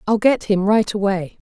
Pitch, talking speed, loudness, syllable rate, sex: 205 Hz, 205 wpm, -18 LUFS, 4.8 syllables/s, female